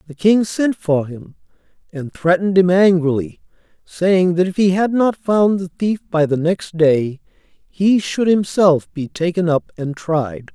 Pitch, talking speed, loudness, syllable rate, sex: 175 Hz, 170 wpm, -17 LUFS, 4.1 syllables/s, male